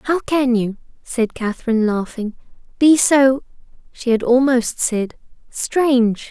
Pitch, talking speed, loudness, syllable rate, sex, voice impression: 245 Hz, 125 wpm, -17 LUFS, 4.0 syllables/s, female, very feminine, young, tensed, slightly cute, friendly, slightly lively